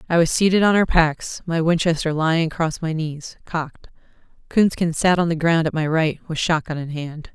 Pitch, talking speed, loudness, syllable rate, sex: 160 Hz, 215 wpm, -20 LUFS, 5.1 syllables/s, female